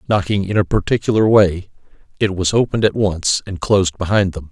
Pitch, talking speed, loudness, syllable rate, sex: 95 Hz, 185 wpm, -17 LUFS, 5.8 syllables/s, male